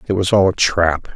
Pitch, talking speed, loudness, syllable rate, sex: 90 Hz, 260 wpm, -15 LUFS, 5.1 syllables/s, male